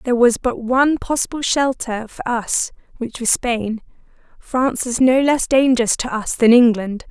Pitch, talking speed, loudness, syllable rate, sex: 245 Hz, 170 wpm, -17 LUFS, 4.8 syllables/s, female